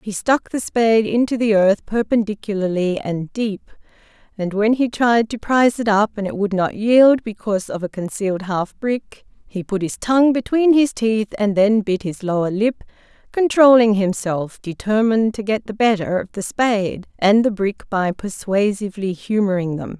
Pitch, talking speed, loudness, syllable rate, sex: 210 Hz, 175 wpm, -18 LUFS, 4.8 syllables/s, female